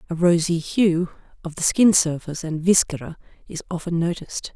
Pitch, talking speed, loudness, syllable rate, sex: 170 Hz, 160 wpm, -21 LUFS, 5.4 syllables/s, female